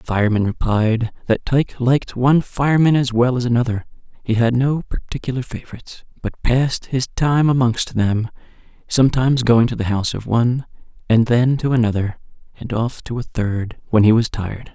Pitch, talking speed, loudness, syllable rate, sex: 120 Hz, 175 wpm, -18 LUFS, 5.5 syllables/s, male